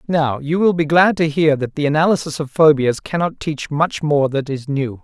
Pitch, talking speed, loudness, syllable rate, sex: 150 Hz, 225 wpm, -17 LUFS, 4.9 syllables/s, male